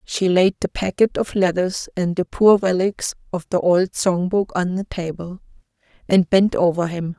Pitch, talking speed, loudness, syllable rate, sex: 185 Hz, 185 wpm, -19 LUFS, 4.4 syllables/s, female